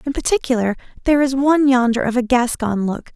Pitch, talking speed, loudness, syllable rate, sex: 250 Hz, 190 wpm, -17 LUFS, 6.2 syllables/s, female